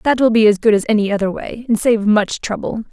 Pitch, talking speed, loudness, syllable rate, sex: 220 Hz, 265 wpm, -16 LUFS, 5.8 syllables/s, female